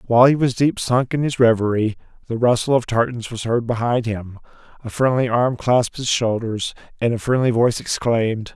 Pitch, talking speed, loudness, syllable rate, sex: 120 Hz, 190 wpm, -19 LUFS, 5.4 syllables/s, male